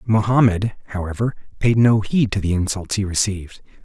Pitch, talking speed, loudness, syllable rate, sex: 105 Hz, 155 wpm, -19 LUFS, 5.4 syllables/s, male